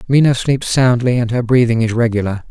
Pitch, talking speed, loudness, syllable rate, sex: 120 Hz, 190 wpm, -15 LUFS, 5.6 syllables/s, male